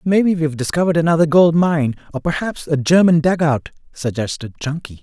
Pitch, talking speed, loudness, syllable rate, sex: 155 Hz, 155 wpm, -17 LUFS, 5.8 syllables/s, male